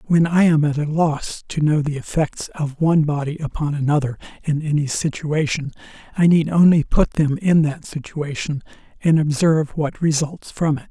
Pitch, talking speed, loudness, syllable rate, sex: 150 Hz, 175 wpm, -19 LUFS, 5.0 syllables/s, male